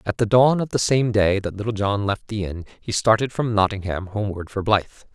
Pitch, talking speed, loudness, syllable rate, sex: 105 Hz, 235 wpm, -21 LUFS, 5.3 syllables/s, male